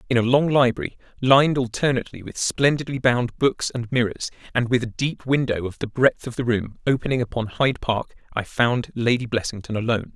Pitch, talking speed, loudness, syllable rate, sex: 120 Hz, 190 wpm, -22 LUFS, 5.7 syllables/s, male